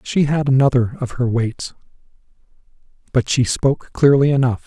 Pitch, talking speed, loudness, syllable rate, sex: 130 Hz, 140 wpm, -17 LUFS, 5.0 syllables/s, male